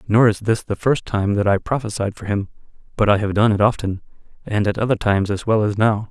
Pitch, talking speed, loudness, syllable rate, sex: 105 Hz, 245 wpm, -19 LUFS, 5.9 syllables/s, male